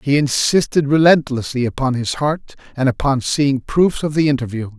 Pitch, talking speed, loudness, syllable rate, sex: 135 Hz, 165 wpm, -17 LUFS, 5.0 syllables/s, male